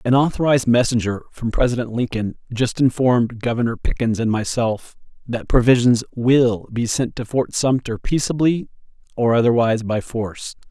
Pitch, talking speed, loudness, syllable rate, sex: 120 Hz, 140 wpm, -19 LUFS, 5.1 syllables/s, male